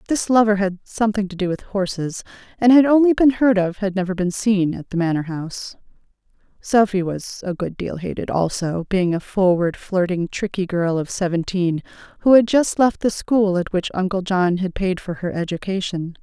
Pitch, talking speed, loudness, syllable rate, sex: 190 Hz, 190 wpm, -20 LUFS, 5.1 syllables/s, female